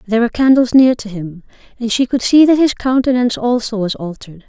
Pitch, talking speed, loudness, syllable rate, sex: 235 Hz, 215 wpm, -14 LUFS, 6.3 syllables/s, female